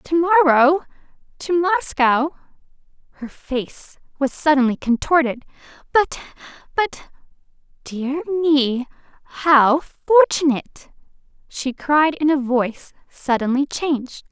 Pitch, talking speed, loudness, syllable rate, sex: 290 Hz, 85 wpm, -19 LUFS, 4.2 syllables/s, female